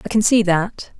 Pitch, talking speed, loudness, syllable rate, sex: 200 Hz, 240 wpm, -17 LUFS, 4.7 syllables/s, female